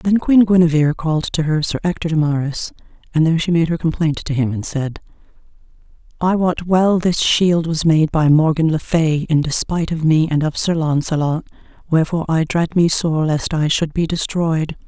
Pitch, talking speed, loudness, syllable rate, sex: 160 Hz, 200 wpm, -17 LUFS, 5.1 syllables/s, female